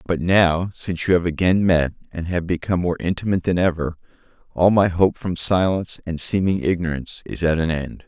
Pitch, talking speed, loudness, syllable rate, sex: 85 Hz, 195 wpm, -20 LUFS, 5.7 syllables/s, male